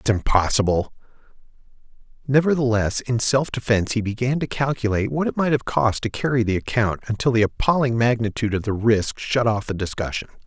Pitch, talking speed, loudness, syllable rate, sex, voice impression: 115 Hz, 170 wpm, -21 LUFS, 5.9 syllables/s, male, masculine, adult-like, slightly muffled, slightly refreshing, sincere, friendly, slightly elegant